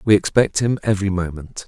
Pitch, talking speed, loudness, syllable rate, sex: 100 Hz, 180 wpm, -19 LUFS, 5.9 syllables/s, male